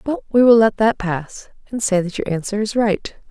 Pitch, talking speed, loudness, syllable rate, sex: 210 Hz, 235 wpm, -18 LUFS, 4.9 syllables/s, female